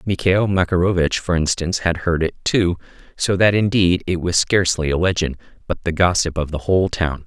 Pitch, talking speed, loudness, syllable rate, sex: 85 Hz, 190 wpm, -18 LUFS, 5.5 syllables/s, male